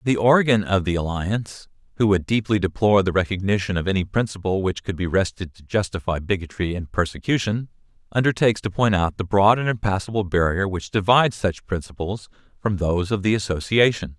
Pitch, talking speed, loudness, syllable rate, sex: 100 Hz, 175 wpm, -22 LUFS, 5.8 syllables/s, male